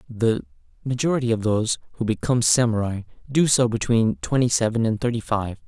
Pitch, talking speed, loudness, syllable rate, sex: 115 Hz, 160 wpm, -22 LUFS, 5.9 syllables/s, male